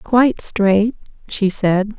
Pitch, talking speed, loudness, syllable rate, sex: 210 Hz, 120 wpm, -17 LUFS, 3.2 syllables/s, female